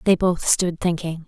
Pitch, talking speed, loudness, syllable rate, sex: 175 Hz, 190 wpm, -21 LUFS, 4.4 syllables/s, female